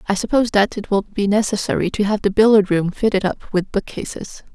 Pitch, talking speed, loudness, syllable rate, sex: 205 Hz, 225 wpm, -18 LUFS, 5.8 syllables/s, female